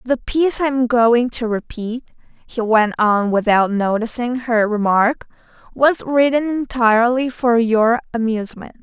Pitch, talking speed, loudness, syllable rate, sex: 235 Hz, 130 wpm, -17 LUFS, 4.2 syllables/s, female